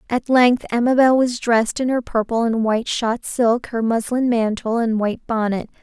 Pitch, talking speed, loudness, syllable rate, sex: 235 Hz, 185 wpm, -19 LUFS, 4.9 syllables/s, female